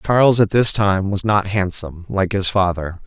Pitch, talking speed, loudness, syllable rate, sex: 100 Hz, 195 wpm, -17 LUFS, 4.8 syllables/s, male